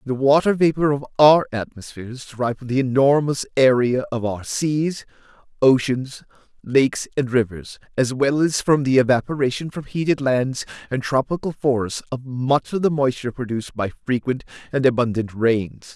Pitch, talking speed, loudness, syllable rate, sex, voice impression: 130 Hz, 160 wpm, -20 LUFS, 5.1 syllables/s, male, masculine, adult-like, fluent, slightly refreshing, sincere, slightly lively